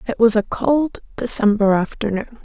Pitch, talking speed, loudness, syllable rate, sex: 220 Hz, 150 wpm, -18 LUFS, 4.7 syllables/s, female